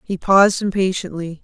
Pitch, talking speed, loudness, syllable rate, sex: 185 Hz, 125 wpm, -17 LUFS, 5.3 syllables/s, female